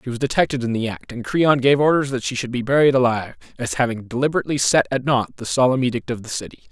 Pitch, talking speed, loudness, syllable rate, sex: 125 Hz, 250 wpm, -20 LUFS, 6.9 syllables/s, male